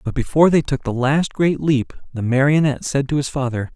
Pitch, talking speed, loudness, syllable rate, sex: 140 Hz, 225 wpm, -18 LUFS, 5.7 syllables/s, male